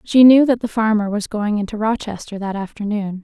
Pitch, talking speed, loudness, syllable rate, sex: 215 Hz, 205 wpm, -18 LUFS, 5.4 syllables/s, female